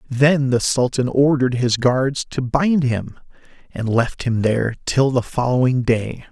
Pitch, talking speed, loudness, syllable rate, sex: 130 Hz, 160 wpm, -18 LUFS, 4.1 syllables/s, male